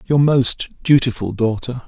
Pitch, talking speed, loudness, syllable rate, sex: 125 Hz, 130 wpm, -17 LUFS, 4.4 syllables/s, male